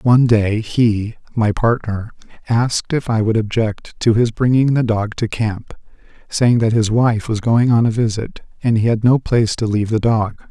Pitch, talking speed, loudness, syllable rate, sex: 115 Hz, 200 wpm, -17 LUFS, 4.7 syllables/s, male